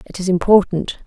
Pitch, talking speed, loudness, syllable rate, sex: 185 Hz, 170 wpm, -16 LUFS, 5.6 syllables/s, female